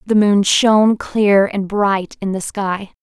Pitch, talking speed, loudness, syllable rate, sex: 200 Hz, 180 wpm, -15 LUFS, 3.7 syllables/s, female